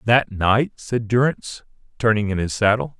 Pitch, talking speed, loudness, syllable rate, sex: 110 Hz, 160 wpm, -20 LUFS, 4.8 syllables/s, male